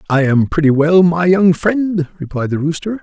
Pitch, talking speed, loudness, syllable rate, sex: 165 Hz, 200 wpm, -14 LUFS, 4.7 syllables/s, male